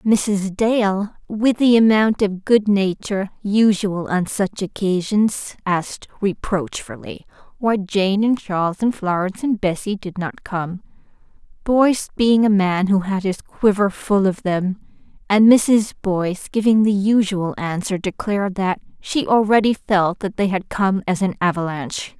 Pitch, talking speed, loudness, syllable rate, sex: 200 Hz, 145 wpm, -19 LUFS, 4.2 syllables/s, female